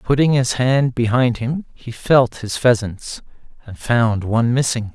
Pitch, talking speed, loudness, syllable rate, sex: 120 Hz, 160 wpm, -17 LUFS, 4.1 syllables/s, male